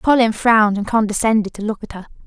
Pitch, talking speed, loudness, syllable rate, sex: 215 Hz, 210 wpm, -16 LUFS, 6.3 syllables/s, female